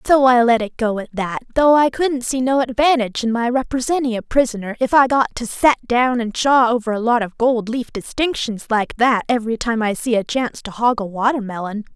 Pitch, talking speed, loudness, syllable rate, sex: 240 Hz, 225 wpm, -18 LUFS, 5.5 syllables/s, female